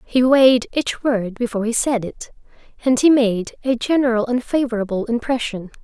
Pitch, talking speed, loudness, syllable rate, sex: 240 Hz, 155 wpm, -18 LUFS, 5.2 syllables/s, female